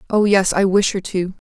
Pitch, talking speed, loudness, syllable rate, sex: 195 Hz, 245 wpm, -17 LUFS, 5.2 syllables/s, female